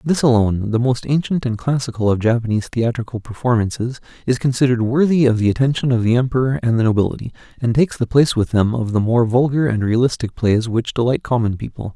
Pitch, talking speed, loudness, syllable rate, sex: 120 Hz, 200 wpm, -18 LUFS, 6.4 syllables/s, male